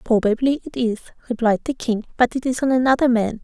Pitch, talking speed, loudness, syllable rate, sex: 240 Hz, 210 wpm, -20 LUFS, 5.9 syllables/s, female